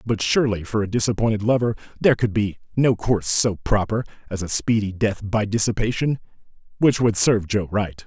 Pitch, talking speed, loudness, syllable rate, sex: 105 Hz, 170 wpm, -21 LUFS, 5.7 syllables/s, male